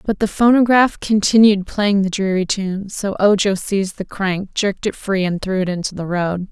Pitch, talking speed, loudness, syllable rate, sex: 195 Hz, 205 wpm, -17 LUFS, 4.9 syllables/s, female